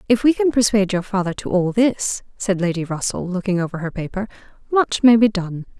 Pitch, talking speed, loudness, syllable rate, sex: 200 Hz, 205 wpm, -19 LUFS, 5.7 syllables/s, female